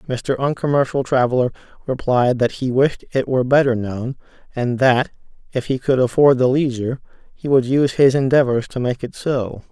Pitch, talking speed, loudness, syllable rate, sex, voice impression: 130 Hz, 175 wpm, -18 LUFS, 5.2 syllables/s, male, masculine, very adult-like, slightly thick, slightly soft, sincere, calm, friendly, slightly kind